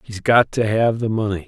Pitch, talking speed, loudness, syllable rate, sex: 110 Hz, 245 wpm, -18 LUFS, 5.1 syllables/s, male